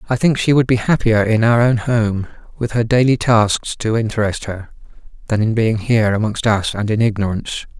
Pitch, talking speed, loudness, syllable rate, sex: 110 Hz, 200 wpm, -16 LUFS, 5.4 syllables/s, male